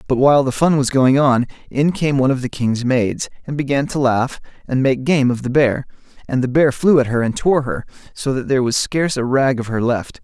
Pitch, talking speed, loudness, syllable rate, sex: 130 Hz, 250 wpm, -17 LUFS, 5.5 syllables/s, male